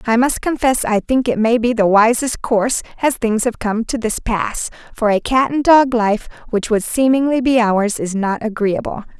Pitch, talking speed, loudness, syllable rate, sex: 230 Hz, 210 wpm, -16 LUFS, 4.7 syllables/s, female